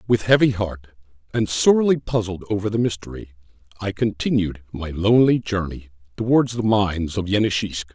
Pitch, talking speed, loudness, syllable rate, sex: 100 Hz, 145 wpm, -21 LUFS, 5.4 syllables/s, male